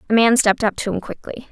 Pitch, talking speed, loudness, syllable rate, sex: 225 Hz, 275 wpm, -18 LUFS, 6.9 syllables/s, female